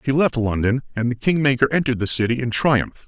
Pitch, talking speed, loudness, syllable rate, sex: 125 Hz, 215 wpm, -20 LUFS, 6.3 syllables/s, male